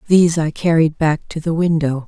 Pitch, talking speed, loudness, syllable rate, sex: 160 Hz, 205 wpm, -17 LUFS, 5.3 syllables/s, female